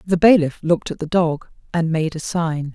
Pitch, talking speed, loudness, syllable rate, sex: 165 Hz, 220 wpm, -19 LUFS, 5.0 syllables/s, female